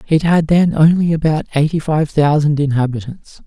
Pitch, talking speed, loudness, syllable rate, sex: 155 Hz, 155 wpm, -14 LUFS, 5.0 syllables/s, male